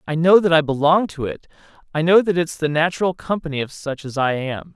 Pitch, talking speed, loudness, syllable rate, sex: 160 Hz, 240 wpm, -19 LUFS, 5.8 syllables/s, male